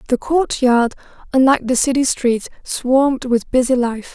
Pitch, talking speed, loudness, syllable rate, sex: 255 Hz, 160 wpm, -17 LUFS, 4.7 syllables/s, female